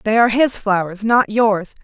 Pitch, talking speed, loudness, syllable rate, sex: 215 Hz, 195 wpm, -16 LUFS, 4.9 syllables/s, female